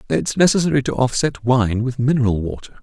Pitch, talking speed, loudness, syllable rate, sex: 125 Hz, 170 wpm, -18 LUFS, 5.8 syllables/s, male